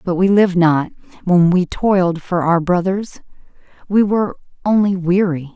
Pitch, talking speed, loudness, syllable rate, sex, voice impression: 180 Hz, 150 wpm, -16 LUFS, 4.8 syllables/s, female, very feminine, very adult-like, slightly thin, tensed, slightly powerful, bright, slightly hard, clear, fluent, slightly raspy, slightly cute, very intellectual, refreshing, very sincere, calm, friendly, reassuring, slightly unique, elegant, slightly wild, sweet, slightly lively, kind, modest, light